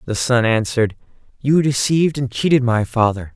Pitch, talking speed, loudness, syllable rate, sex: 125 Hz, 160 wpm, -17 LUFS, 5.4 syllables/s, male